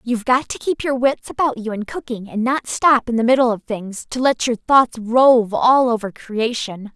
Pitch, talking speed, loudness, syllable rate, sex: 240 Hz, 225 wpm, -18 LUFS, 4.7 syllables/s, female